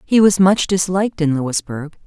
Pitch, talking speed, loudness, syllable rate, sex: 175 Hz, 175 wpm, -16 LUFS, 4.9 syllables/s, female